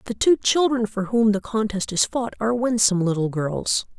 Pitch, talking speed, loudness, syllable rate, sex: 215 Hz, 195 wpm, -21 LUFS, 5.2 syllables/s, female